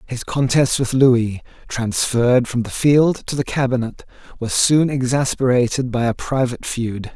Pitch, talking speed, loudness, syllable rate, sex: 125 Hz, 150 wpm, -18 LUFS, 4.7 syllables/s, male